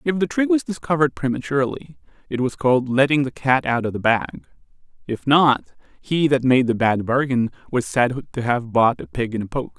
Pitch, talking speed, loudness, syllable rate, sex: 125 Hz, 195 wpm, -20 LUFS, 5.3 syllables/s, male